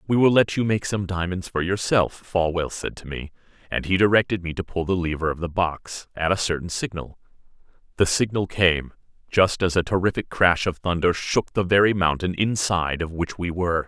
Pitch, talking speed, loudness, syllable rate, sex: 90 Hz, 205 wpm, -23 LUFS, 5.3 syllables/s, male